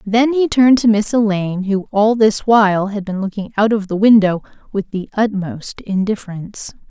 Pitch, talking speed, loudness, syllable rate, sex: 205 Hz, 180 wpm, -16 LUFS, 5.1 syllables/s, female